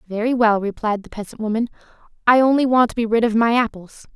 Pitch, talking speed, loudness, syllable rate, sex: 225 Hz, 215 wpm, -18 LUFS, 6.1 syllables/s, female